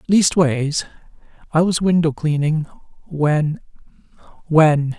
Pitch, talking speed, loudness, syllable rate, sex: 155 Hz, 70 wpm, -18 LUFS, 3.6 syllables/s, male